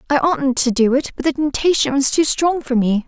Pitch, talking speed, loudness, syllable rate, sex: 275 Hz, 255 wpm, -17 LUFS, 5.3 syllables/s, female